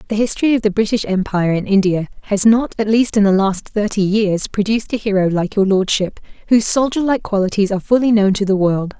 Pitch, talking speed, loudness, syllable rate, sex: 205 Hz, 220 wpm, -16 LUFS, 6.1 syllables/s, female